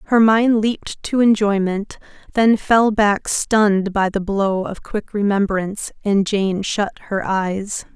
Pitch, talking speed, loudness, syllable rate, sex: 205 Hz, 150 wpm, -18 LUFS, 3.9 syllables/s, female